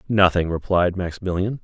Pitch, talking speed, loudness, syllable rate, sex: 90 Hz, 110 wpm, -21 LUFS, 5.4 syllables/s, male